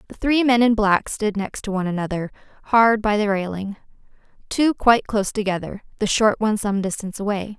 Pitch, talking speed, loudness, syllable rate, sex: 210 Hz, 190 wpm, -20 LUFS, 5.8 syllables/s, female